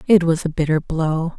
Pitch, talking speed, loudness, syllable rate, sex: 165 Hz, 215 wpm, -19 LUFS, 4.9 syllables/s, female